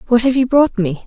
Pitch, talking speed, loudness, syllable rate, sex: 235 Hz, 280 wpm, -15 LUFS, 5.8 syllables/s, female